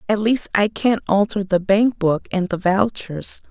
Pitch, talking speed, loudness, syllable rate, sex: 200 Hz, 190 wpm, -19 LUFS, 4.1 syllables/s, female